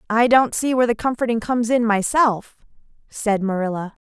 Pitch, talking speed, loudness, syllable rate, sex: 225 Hz, 160 wpm, -19 LUFS, 5.5 syllables/s, female